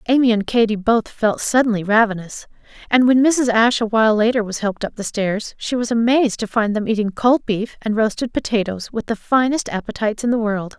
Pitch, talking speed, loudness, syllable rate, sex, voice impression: 225 Hz, 205 wpm, -18 LUFS, 5.7 syllables/s, female, feminine, slightly adult-like, slightly tensed, sincere, slightly lively